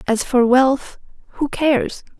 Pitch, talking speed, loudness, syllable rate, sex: 260 Hz, 135 wpm, -17 LUFS, 4.0 syllables/s, female